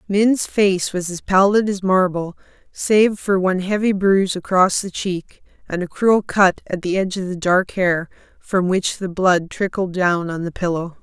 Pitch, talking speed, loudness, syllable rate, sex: 185 Hz, 190 wpm, -19 LUFS, 4.4 syllables/s, female